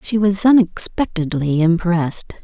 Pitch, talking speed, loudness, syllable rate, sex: 185 Hz, 100 wpm, -17 LUFS, 4.4 syllables/s, female